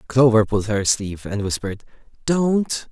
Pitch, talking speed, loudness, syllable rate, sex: 115 Hz, 145 wpm, -20 LUFS, 5.2 syllables/s, male